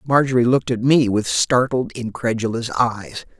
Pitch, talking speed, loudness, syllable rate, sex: 115 Hz, 140 wpm, -19 LUFS, 4.9 syllables/s, male